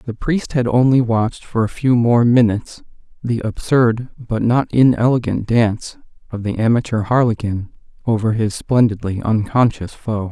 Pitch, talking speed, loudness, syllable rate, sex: 115 Hz, 145 wpm, -17 LUFS, 4.7 syllables/s, male